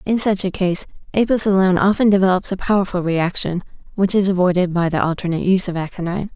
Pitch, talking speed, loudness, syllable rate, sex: 185 Hz, 190 wpm, -18 LUFS, 6.8 syllables/s, female